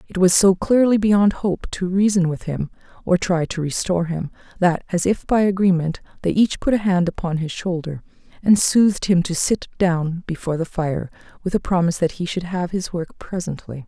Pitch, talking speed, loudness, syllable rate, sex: 180 Hz, 195 wpm, -20 LUFS, 5.2 syllables/s, female